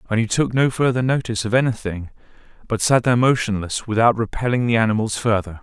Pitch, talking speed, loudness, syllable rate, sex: 115 Hz, 180 wpm, -19 LUFS, 6.4 syllables/s, male